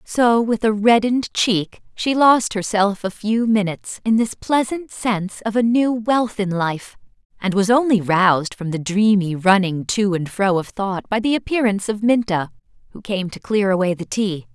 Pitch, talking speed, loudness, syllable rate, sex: 210 Hz, 190 wpm, -19 LUFS, 4.7 syllables/s, female